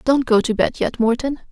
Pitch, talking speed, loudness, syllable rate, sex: 245 Hz, 240 wpm, -18 LUFS, 5.3 syllables/s, female